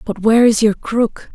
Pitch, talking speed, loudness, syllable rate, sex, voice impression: 215 Hz, 225 wpm, -15 LUFS, 4.9 syllables/s, female, feminine, adult-like, tensed, slightly dark, fluent, intellectual, elegant, slightly strict, slightly sharp